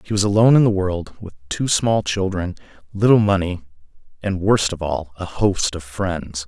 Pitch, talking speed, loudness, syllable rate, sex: 95 Hz, 185 wpm, -19 LUFS, 4.9 syllables/s, male